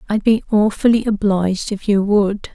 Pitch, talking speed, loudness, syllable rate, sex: 205 Hz, 165 wpm, -17 LUFS, 4.8 syllables/s, female